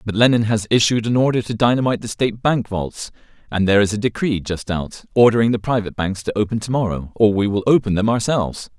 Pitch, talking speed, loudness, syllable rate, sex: 110 Hz, 225 wpm, -18 LUFS, 6.3 syllables/s, male